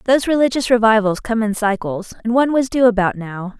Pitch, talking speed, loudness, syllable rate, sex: 225 Hz, 200 wpm, -17 LUFS, 5.9 syllables/s, female